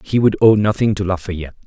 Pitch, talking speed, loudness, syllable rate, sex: 100 Hz, 215 wpm, -16 LUFS, 6.4 syllables/s, male